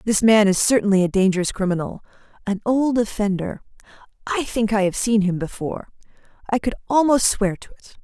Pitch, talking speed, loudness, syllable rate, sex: 210 Hz, 150 wpm, -20 LUFS, 5.6 syllables/s, female